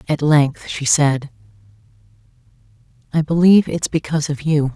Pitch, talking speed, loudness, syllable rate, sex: 135 Hz, 125 wpm, -17 LUFS, 5.1 syllables/s, female